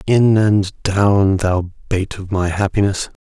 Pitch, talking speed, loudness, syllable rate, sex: 100 Hz, 150 wpm, -17 LUFS, 3.3 syllables/s, male